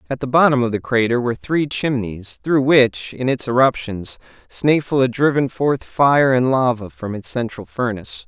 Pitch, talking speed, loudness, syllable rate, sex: 125 Hz, 180 wpm, -18 LUFS, 4.8 syllables/s, male